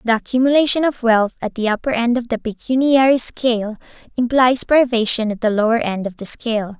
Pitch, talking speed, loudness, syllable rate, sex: 235 Hz, 185 wpm, -17 LUFS, 5.6 syllables/s, female